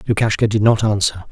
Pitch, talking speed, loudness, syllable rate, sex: 105 Hz, 185 wpm, -16 LUFS, 6.2 syllables/s, male